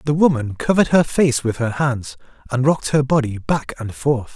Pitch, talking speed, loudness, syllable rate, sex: 130 Hz, 205 wpm, -19 LUFS, 5.3 syllables/s, male